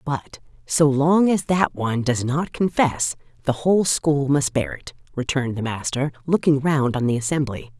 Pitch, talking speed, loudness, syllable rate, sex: 140 Hz, 175 wpm, -21 LUFS, 4.7 syllables/s, female